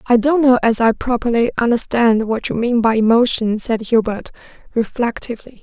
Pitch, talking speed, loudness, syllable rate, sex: 235 Hz, 160 wpm, -16 LUFS, 5.2 syllables/s, female